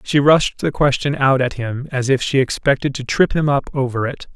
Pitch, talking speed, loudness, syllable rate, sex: 135 Hz, 235 wpm, -18 LUFS, 5.1 syllables/s, male